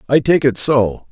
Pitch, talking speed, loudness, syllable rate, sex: 130 Hz, 215 wpm, -15 LUFS, 4.3 syllables/s, male